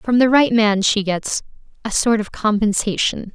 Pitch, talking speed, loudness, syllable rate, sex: 215 Hz, 160 wpm, -17 LUFS, 4.5 syllables/s, female